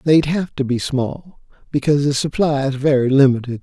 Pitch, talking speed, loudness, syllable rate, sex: 140 Hz, 180 wpm, -18 LUFS, 5.3 syllables/s, male